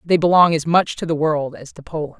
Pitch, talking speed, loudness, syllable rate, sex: 160 Hz, 275 wpm, -17 LUFS, 5.8 syllables/s, female